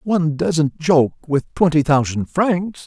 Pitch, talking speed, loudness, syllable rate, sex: 160 Hz, 145 wpm, -18 LUFS, 3.8 syllables/s, male